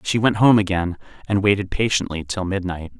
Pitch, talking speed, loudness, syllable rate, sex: 95 Hz, 180 wpm, -20 LUFS, 5.5 syllables/s, male